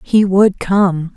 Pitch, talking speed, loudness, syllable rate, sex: 190 Hz, 155 wpm, -13 LUFS, 2.9 syllables/s, female